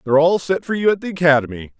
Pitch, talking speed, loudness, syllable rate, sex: 160 Hz, 265 wpm, -17 LUFS, 7.3 syllables/s, male